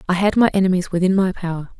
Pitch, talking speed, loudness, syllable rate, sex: 185 Hz, 235 wpm, -18 LUFS, 7.1 syllables/s, female